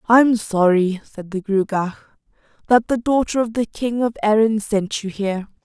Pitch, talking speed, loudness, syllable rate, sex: 215 Hz, 170 wpm, -19 LUFS, 4.6 syllables/s, female